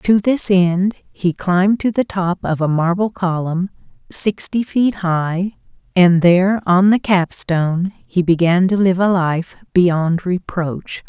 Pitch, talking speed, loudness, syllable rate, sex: 185 Hz, 150 wpm, -16 LUFS, 3.7 syllables/s, female